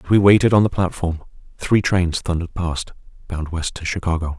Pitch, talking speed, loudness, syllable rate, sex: 90 Hz, 190 wpm, -19 LUFS, 5.5 syllables/s, male